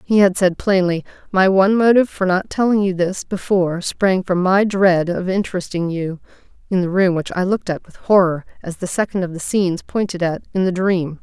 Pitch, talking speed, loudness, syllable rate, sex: 185 Hz, 215 wpm, -18 LUFS, 5.5 syllables/s, female